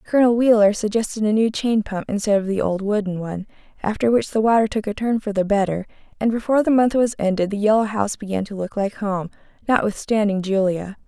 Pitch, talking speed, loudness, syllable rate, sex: 210 Hz, 210 wpm, -20 LUFS, 6.1 syllables/s, female